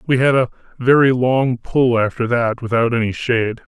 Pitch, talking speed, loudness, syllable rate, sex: 120 Hz, 175 wpm, -17 LUFS, 5.0 syllables/s, male